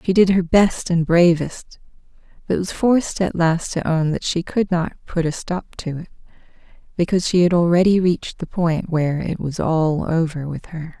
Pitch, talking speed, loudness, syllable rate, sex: 170 Hz, 195 wpm, -19 LUFS, 4.9 syllables/s, female